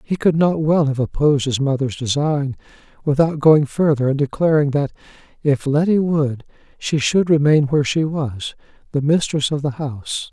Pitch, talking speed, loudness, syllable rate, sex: 145 Hz, 170 wpm, -18 LUFS, 4.9 syllables/s, male